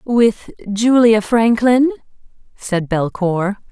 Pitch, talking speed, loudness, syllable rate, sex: 220 Hz, 80 wpm, -15 LUFS, 3.0 syllables/s, female